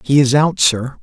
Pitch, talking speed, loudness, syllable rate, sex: 135 Hz, 235 wpm, -14 LUFS, 4.4 syllables/s, male